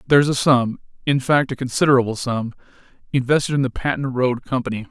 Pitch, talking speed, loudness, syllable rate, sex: 130 Hz, 145 wpm, -20 LUFS, 6.1 syllables/s, male